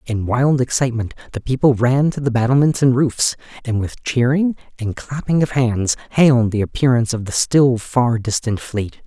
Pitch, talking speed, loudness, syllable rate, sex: 125 Hz, 180 wpm, -18 LUFS, 5.0 syllables/s, male